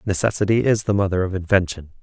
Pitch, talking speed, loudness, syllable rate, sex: 95 Hz, 180 wpm, -20 LUFS, 6.5 syllables/s, male